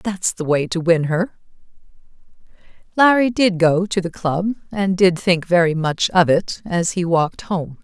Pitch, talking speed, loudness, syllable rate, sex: 180 Hz, 175 wpm, -18 LUFS, 4.4 syllables/s, female